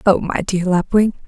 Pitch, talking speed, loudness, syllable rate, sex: 190 Hz, 190 wpm, -17 LUFS, 5.0 syllables/s, female